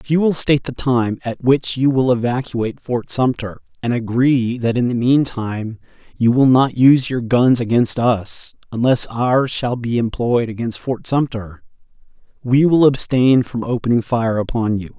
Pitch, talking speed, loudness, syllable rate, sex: 125 Hz, 175 wpm, -17 LUFS, 4.5 syllables/s, male